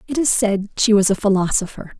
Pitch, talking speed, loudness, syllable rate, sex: 205 Hz, 210 wpm, -17 LUFS, 5.8 syllables/s, female